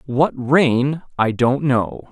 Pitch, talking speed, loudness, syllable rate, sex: 135 Hz, 140 wpm, -18 LUFS, 2.8 syllables/s, male